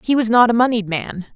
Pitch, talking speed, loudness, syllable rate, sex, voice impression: 225 Hz, 265 wpm, -16 LUFS, 5.9 syllables/s, female, feminine, adult-like, bright, clear, fluent, calm, friendly, reassuring, unique, lively, kind, slightly modest